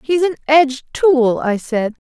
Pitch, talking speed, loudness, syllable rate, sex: 270 Hz, 175 wpm, -16 LUFS, 4.2 syllables/s, female